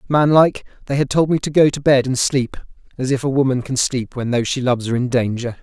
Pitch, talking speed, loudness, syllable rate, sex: 130 Hz, 255 wpm, -18 LUFS, 6.4 syllables/s, male